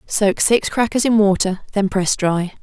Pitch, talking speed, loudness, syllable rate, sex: 200 Hz, 185 wpm, -17 LUFS, 4.3 syllables/s, female